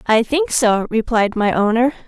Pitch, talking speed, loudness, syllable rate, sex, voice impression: 235 Hz, 175 wpm, -17 LUFS, 4.5 syllables/s, female, very feminine, slightly adult-like, very thin, slightly tensed, slightly weak, slightly dark, soft, clear, fluent, cute, intellectual, refreshing, sincere, very calm, very friendly, very reassuring, unique, very elegant, slightly wild, sweet, lively, kind, slightly sharp, slightly modest, light